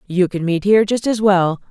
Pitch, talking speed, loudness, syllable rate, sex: 190 Hz, 245 wpm, -16 LUFS, 5.3 syllables/s, female